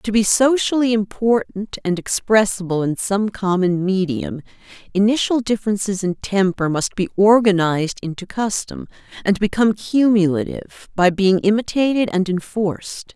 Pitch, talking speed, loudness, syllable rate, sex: 200 Hz, 125 wpm, -18 LUFS, 4.8 syllables/s, female